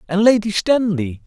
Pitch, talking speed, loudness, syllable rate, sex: 200 Hz, 140 wpm, -17 LUFS, 4.7 syllables/s, male